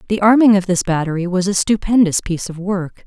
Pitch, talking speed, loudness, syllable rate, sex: 190 Hz, 215 wpm, -16 LUFS, 5.9 syllables/s, female